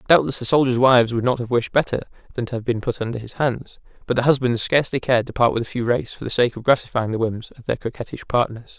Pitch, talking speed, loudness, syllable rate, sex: 120 Hz, 265 wpm, -21 LUFS, 6.7 syllables/s, male